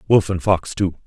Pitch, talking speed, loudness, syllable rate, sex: 90 Hz, 225 wpm, -19 LUFS, 5.1 syllables/s, male